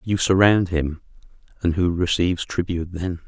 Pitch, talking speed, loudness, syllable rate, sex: 90 Hz, 145 wpm, -21 LUFS, 5.1 syllables/s, male